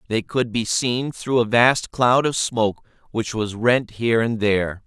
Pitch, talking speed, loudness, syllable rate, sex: 115 Hz, 195 wpm, -20 LUFS, 4.3 syllables/s, male